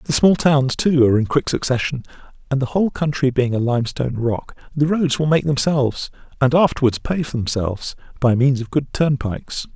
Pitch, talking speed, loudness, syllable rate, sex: 135 Hz, 185 wpm, -19 LUFS, 5.5 syllables/s, male